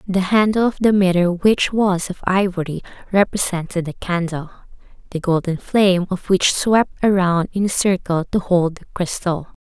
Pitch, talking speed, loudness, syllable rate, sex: 185 Hz, 160 wpm, -18 LUFS, 4.7 syllables/s, female